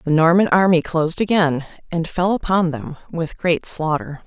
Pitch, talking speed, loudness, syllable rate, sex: 165 Hz, 170 wpm, -19 LUFS, 4.8 syllables/s, female